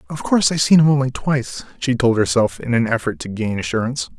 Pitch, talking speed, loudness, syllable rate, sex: 120 Hz, 230 wpm, -18 LUFS, 6.6 syllables/s, male